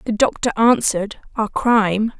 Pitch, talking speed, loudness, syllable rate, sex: 220 Hz, 135 wpm, -18 LUFS, 4.9 syllables/s, female